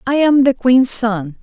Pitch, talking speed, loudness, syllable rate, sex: 245 Hz, 170 wpm, -14 LUFS, 3.1 syllables/s, female